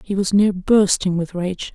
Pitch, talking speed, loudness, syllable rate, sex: 190 Hz, 205 wpm, -18 LUFS, 4.2 syllables/s, female